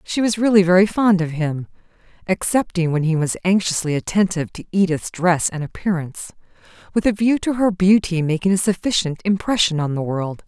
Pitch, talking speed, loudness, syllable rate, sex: 180 Hz, 180 wpm, -19 LUFS, 5.6 syllables/s, female